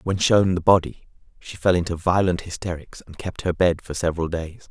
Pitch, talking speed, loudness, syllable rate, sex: 90 Hz, 205 wpm, -22 LUFS, 5.4 syllables/s, male